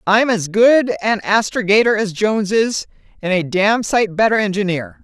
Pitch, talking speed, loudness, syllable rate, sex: 210 Hz, 165 wpm, -16 LUFS, 4.6 syllables/s, female